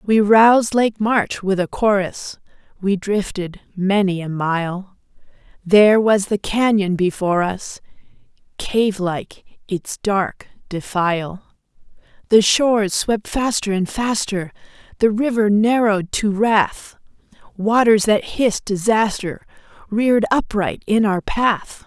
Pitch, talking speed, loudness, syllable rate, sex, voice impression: 205 Hz, 115 wpm, -18 LUFS, 3.8 syllables/s, female, feminine, adult-like, slightly thick, tensed, slightly hard, slightly muffled, slightly intellectual, friendly, reassuring, elegant, slightly lively